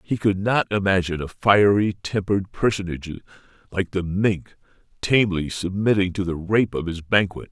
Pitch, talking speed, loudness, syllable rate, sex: 95 Hz, 150 wpm, -22 LUFS, 5.1 syllables/s, male